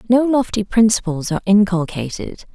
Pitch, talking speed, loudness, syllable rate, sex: 205 Hz, 120 wpm, -17 LUFS, 5.3 syllables/s, female